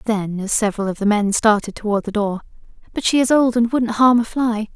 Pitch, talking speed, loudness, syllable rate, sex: 220 Hz, 240 wpm, -18 LUFS, 5.7 syllables/s, female